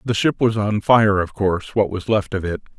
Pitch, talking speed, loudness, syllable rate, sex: 105 Hz, 260 wpm, -19 LUFS, 5.2 syllables/s, male